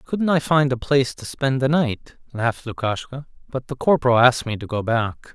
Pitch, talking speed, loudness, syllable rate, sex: 125 Hz, 215 wpm, -21 LUFS, 5.2 syllables/s, male